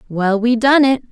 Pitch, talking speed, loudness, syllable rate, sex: 235 Hz, 215 wpm, -14 LUFS, 4.5 syllables/s, female